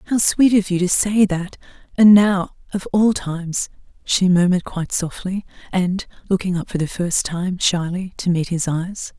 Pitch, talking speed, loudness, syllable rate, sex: 185 Hz, 185 wpm, -19 LUFS, 4.6 syllables/s, female